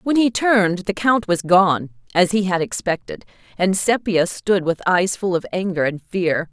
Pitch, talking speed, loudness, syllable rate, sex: 190 Hz, 195 wpm, -19 LUFS, 4.5 syllables/s, female